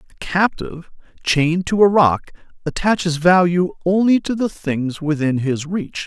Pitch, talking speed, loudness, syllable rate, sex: 175 Hz, 150 wpm, -18 LUFS, 4.8 syllables/s, male